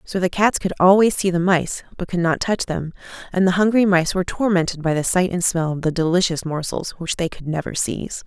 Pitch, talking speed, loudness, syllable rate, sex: 180 Hz, 240 wpm, -20 LUFS, 5.7 syllables/s, female